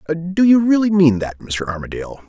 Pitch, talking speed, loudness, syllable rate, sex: 145 Hz, 185 wpm, -16 LUFS, 5.3 syllables/s, male